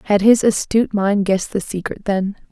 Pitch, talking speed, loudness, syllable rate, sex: 205 Hz, 190 wpm, -18 LUFS, 5.4 syllables/s, female